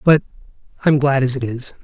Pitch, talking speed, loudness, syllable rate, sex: 135 Hz, 230 wpm, -18 LUFS, 6.6 syllables/s, male